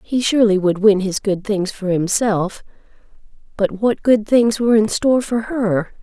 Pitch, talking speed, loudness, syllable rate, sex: 210 Hz, 180 wpm, -17 LUFS, 4.7 syllables/s, female